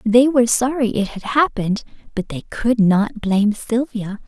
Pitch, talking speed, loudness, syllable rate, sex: 225 Hz, 170 wpm, -18 LUFS, 4.8 syllables/s, female